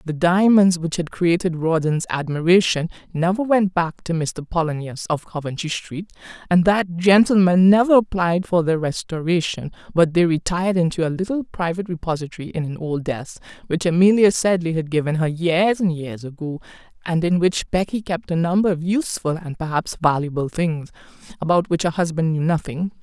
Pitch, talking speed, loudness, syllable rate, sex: 170 Hz, 170 wpm, -20 LUFS, 5.2 syllables/s, female